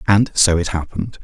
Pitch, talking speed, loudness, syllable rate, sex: 95 Hz, 195 wpm, -17 LUFS, 5.7 syllables/s, male